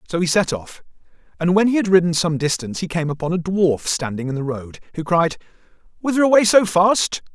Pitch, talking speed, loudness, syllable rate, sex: 170 Hz, 210 wpm, -19 LUFS, 5.8 syllables/s, male